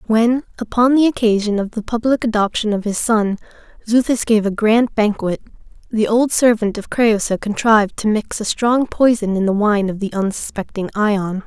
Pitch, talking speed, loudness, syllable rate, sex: 220 Hz, 180 wpm, -17 LUFS, 4.9 syllables/s, female